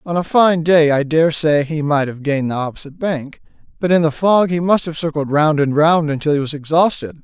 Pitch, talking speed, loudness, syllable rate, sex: 155 Hz, 240 wpm, -16 LUFS, 5.5 syllables/s, male